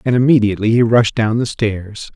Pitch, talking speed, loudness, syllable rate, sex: 115 Hz, 195 wpm, -15 LUFS, 5.4 syllables/s, male